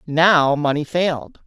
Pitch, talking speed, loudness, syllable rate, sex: 155 Hz, 125 wpm, -17 LUFS, 3.8 syllables/s, female